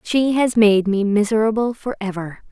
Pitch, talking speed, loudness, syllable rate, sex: 215 Hz, 145 wpm, -18 LUFS, 4.6 syllables/s, female